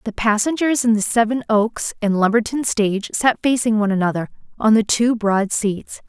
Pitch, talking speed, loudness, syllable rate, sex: 220 Hz, 180 wpm, -18 LUFS, 5.2 syllables/s, female